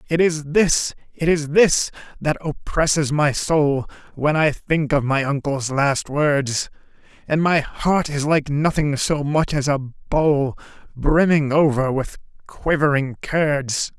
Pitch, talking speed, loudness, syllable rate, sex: 145 Hz, 145 wpm, -20 LUFS, 3.6 syllables/s, male